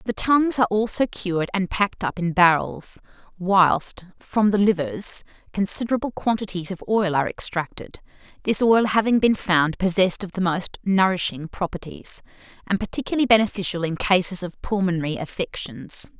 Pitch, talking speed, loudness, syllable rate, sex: 190 Hz, 145 wpm, -22 LUFS, 5.3 syllables/s, female